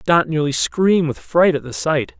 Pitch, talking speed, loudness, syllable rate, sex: 150 Hz, 220 wpm, -18 LUFS, 4.8 syllables/s, male